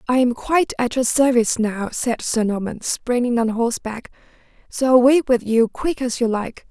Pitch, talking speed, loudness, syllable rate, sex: 240 Hz, 190 wpm, -19 LUFS, 5.0 syllables/s, female